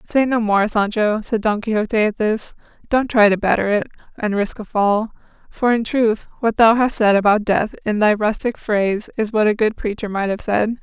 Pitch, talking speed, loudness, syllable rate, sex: 215 Hz, 215 wpm, -18 LUFS, 5.1 syllables/s, female